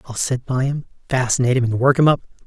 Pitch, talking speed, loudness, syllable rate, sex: 130 Hz, 245 wpm, -19 LUFS, 6.8 syllables/s, male